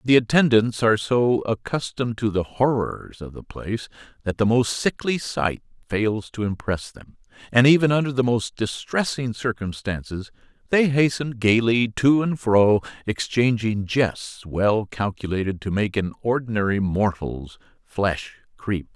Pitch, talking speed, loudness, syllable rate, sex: 110 Hz, 140 wpm, -22 LUFS, 4.4 syllables/s, male